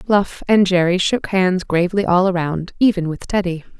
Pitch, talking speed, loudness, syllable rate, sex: 185 Hz, 175 wpm, -17 LUFS, 4.9 syllables/s, female